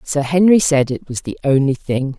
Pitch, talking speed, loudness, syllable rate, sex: 145 Hz, 220 wpm, -16 LUFS, 5.0 syllables/s, female